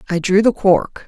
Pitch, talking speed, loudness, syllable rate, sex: 190 Hz, 225 wpm, -15 LUFS, 4.6 syllables/s, female